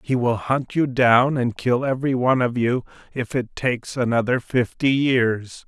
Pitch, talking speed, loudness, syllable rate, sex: 125 Hz, 180 wpm, -21 LUFS, 4.6 syllables/s, male